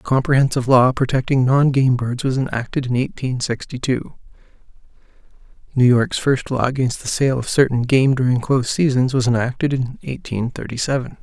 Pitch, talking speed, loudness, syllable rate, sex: 130 Hz, 170 wpm, -18 LUFS, 5.5 syllables/s, male